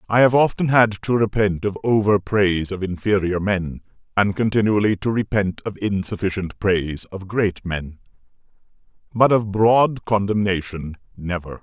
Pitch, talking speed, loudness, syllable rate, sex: 100 Hz, 140 wpm, -20 LUFS, 4.7 syllables/s, male